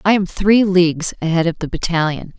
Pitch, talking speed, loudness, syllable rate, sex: 175 Hz, 200 wpm, -16 LUFS, 5.4 syllables/s, female